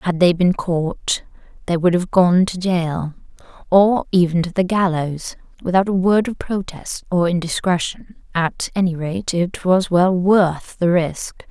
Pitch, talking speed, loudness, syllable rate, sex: 180 Hz, 160 wpm, -18 LUFS, 4.0 syllables/s, female